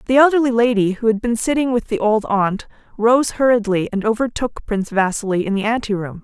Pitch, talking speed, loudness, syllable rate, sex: 225 Hz, 190 wpm, -18 LUFS, 5.7 syllables/s, female